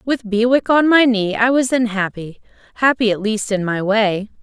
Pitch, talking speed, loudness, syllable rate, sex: 225 Hz, 205 wpm, -16 LUFS, 4.7 syllables/s, female